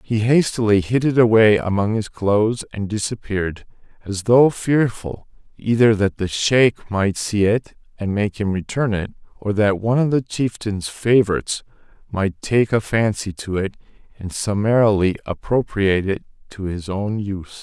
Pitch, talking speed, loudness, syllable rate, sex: 105 Hz, 155 wpm, -19 LUFS, 4.7 syllables/s, male